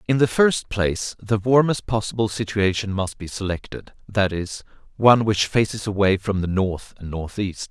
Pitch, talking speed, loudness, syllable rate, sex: 105 Hz, 170 wpm, -21 LUFS, 4.8 syllables/s, male